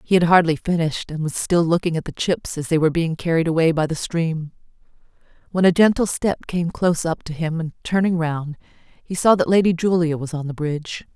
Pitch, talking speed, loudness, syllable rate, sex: 165 Hz, 220 wpm, -20 LUFS, 5.6 syllables/s, female